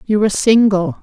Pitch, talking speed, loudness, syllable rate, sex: 210 Hz, 175 wpm, -13 LUFS, 5.4 syllables/s, female